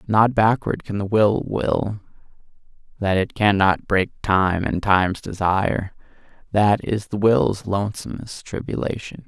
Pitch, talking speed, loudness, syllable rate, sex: 100 Hz, 125 wpm, -21 LUFS, 4.1 syllables/s, male